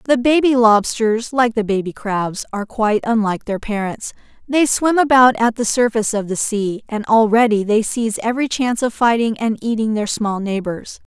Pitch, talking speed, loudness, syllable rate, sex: 225 Hz, 185 wpm, -17 LUFS, 5.2 syllables/s, female